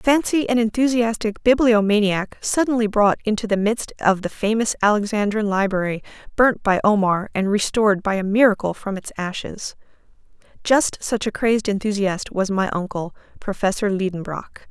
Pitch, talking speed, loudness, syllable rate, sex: 210 Hz, 145 wpm, -20 LUFS, 5.2 syllables/s, female